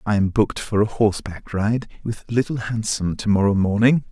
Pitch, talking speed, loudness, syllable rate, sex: 105 Hz, 190 wpm, -21 LUFS, 5.6 syllables/s, male